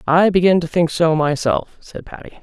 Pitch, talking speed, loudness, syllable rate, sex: 165 Hz, 200 wpm, -16 LUFS, 4.9 syllables/s, female